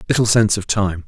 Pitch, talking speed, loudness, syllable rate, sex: 100 Hz, 225 wpm, -17 LUFS, 6.7 syllables/s, male